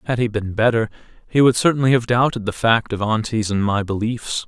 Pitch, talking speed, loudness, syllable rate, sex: 115 Hz, 215 wpm, -19 LUFS, 5.6 syllables/s, male